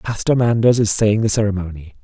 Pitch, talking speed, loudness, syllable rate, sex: 105 Hz, 175 wpm, -16 LUFS, 5.7 syllables/s, male